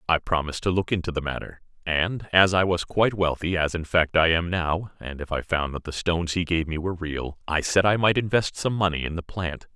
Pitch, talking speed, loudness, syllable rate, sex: 85 Hz, 250 wpm, -24 LUFS, 5.7 syllables/s, male